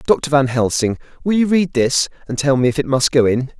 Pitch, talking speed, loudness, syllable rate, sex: 135 Hz, 250 wpm, -17 LUFS, 5.4 syllables/s, male